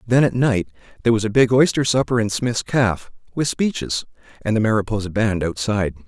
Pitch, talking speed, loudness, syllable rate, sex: 110 Hz, 190 wpm, -20 LUFS, 5.7 syllables/s, male